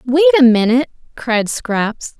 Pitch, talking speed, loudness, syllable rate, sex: 230 Hz, 135 wpm, -14 LUFS, 4.2 syllables/s, female